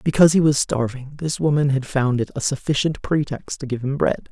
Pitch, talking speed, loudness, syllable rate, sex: 140 Hz, 220 wpm, -21 LUFS, 5.6 syllables/s, male